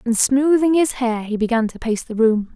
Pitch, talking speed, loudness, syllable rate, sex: 245 Hz, 235 wpm, -18 LUFS, 4.9 syllables/s, female